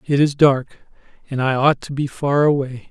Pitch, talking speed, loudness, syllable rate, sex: 140 Hz, 205 wpm, -18 LUFS, 4.9 syllables/s, male